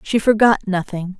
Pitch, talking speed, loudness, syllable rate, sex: 200 Hz, 150 wpm, -17 LUFS, 5.0 syllables/s, female